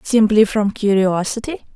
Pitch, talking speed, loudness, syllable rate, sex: 210 Hz, 105 wpm, -16 LUFS, 4.4 syllables/s, female